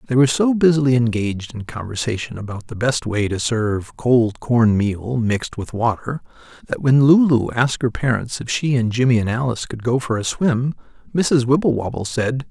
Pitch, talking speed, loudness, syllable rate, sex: 120 Hz, 185 wpm, -19 LUFS, 5.2 syllables/s, male